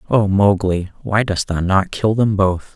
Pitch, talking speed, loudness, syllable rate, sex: 100 Hz, 195 wpm, -17 LUFS, 4.1 syllables/s, male